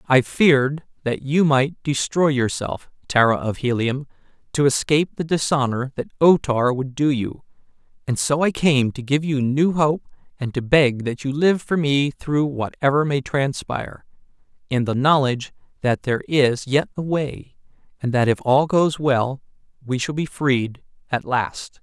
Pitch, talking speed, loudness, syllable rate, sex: 140 Hz, 170 wpm, -20 LUFS, 4.4 syllables/s, male